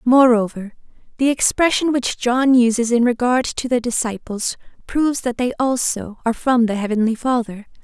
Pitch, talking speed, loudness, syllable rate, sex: 240 Hz, 155 wpm, -18 LUFS, 5.1 syllables/s, female